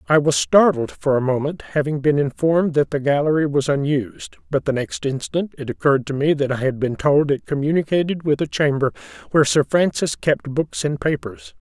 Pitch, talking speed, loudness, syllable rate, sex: 145 Hz, 200 wpm, -20 LUFS, 5.4 syllables/s, male